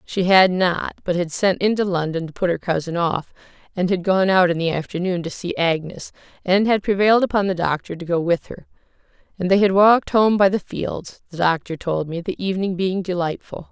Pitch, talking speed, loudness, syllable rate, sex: 180 Hz, 215 wpm, -20 LUFS, 5.4 syllables/s, female